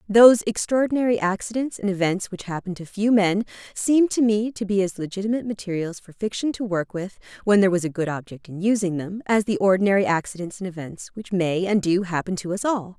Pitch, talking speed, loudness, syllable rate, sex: 200 Hz, 205 wpm, -22 LUFS, 6.0 syllables/s, female